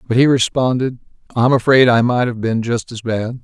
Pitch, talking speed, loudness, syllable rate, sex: 120 Hz, 210 wpm, -16 LUFS, 5.1 syllables/s, male